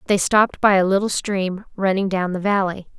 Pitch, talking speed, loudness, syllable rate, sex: 195 Hz, 200 wpm, -19 LUFS, 5.4 syllables/s, female